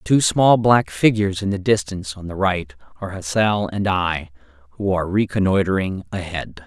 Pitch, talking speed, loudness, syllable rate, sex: 95 Hz, 170 wpm, -20 LUFS, 5.1 syllables/s, male